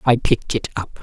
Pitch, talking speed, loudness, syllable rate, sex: 115 Hz, 235 wpm, -21 LUFS, 6.0 syllables/s, female